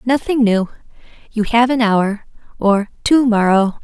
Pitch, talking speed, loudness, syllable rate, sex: 225 Hz, 140 wpm, -15 LUFS, 4.1 syllables/s, female